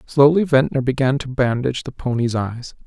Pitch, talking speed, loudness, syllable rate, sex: 130 Hz, 170 wpm, -19 LUFS, 5.3 syllables/s, male